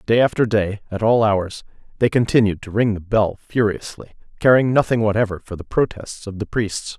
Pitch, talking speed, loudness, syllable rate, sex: 110 Hz, 180 wpm, -19 LUFS, 5.3 syllables/s, male